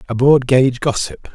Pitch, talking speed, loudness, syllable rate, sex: 130 Hz, 180 wpm, -15 LUFS, 5.1 syllables/s, male